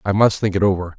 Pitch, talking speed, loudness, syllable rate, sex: 100 Hz, 305 wpm, -18 LUFS, 6.7 syllables/s, male